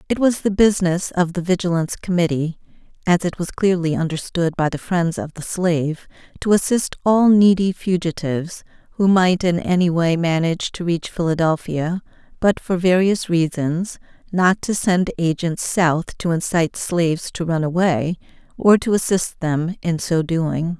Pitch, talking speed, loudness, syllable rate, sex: 175 Hz, 160 wpm, -19 LUFS, 4.7 syllables/s, female